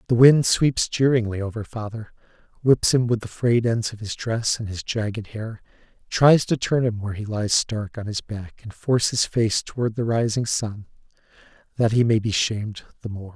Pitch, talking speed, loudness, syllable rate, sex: 110 Hz, 200 wpm, -22 LUFS, 5.0 syllables/s, male